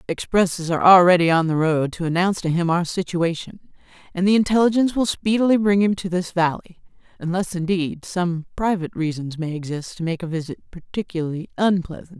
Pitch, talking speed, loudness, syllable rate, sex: 175 Hz, 170 wpm, -20 LUFS, 5.8 syllables/s, female